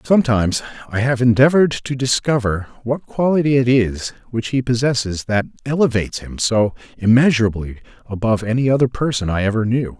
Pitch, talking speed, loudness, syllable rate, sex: 120 Hz, 150 wpm, -18 LUFS, 5.9 syllables/s, male